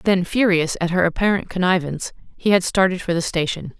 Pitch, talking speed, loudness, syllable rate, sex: 180 Hz, 190 wpm, -20 LUFS, 5.8 syllables/s, female